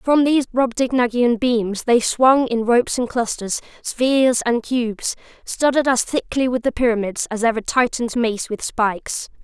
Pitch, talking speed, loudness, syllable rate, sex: 240 Hz, 155 wpm, -19 LUFS, 4.6 syllables/s, female